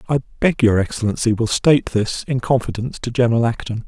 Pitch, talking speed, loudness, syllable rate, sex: 120 Hz, 185 wpm, -19 LUFS, 6.4 syllables/s, male